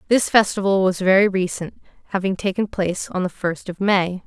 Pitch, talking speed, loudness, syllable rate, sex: 190 Hz, 185 wpm, -20 LUFS, 5.4 syllables/s, female